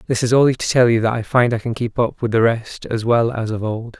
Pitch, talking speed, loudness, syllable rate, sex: 115 Hz, 315 wpm, -18 LUFS, 5.8 syllables/s, male